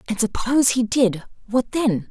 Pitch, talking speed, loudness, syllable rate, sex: 230 Hz, 170 wpm, -20 LUFS, 4.8 syllables/s, female